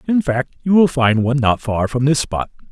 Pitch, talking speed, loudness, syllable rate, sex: 130 Hz, 220 wpm, -17 LUFS, 4.9 syllables/s, male